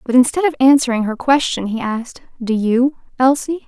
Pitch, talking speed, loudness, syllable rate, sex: 255 Hz, 180 wpm, -16 LUFS, 5.5 syllables/s, female